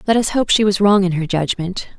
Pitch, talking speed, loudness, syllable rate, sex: 195 Hz, 270 wpm, -16 LUFS, 6.3 syllables/s, female